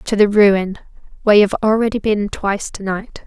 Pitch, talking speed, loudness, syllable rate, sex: 205 Hz, 200 wpm, -16 LUFS, 5.6 syllables/s, female